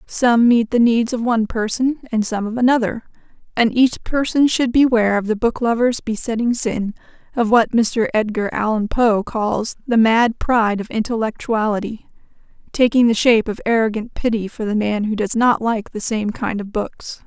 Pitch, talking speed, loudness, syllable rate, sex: 225 Hz, 175 wpm, -18 LUFS, 4.9 syllables/s, female